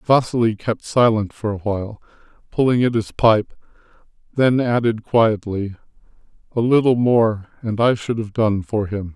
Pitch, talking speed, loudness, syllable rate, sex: 110 Hz, 150 wpm, -19 LUFS, 4.5 syllables/s, male